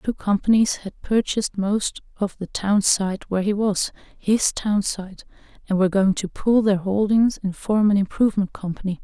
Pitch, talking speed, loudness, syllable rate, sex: 200 Hz, 165 wpm, -21 LUFS, 4.8 syllables/s, female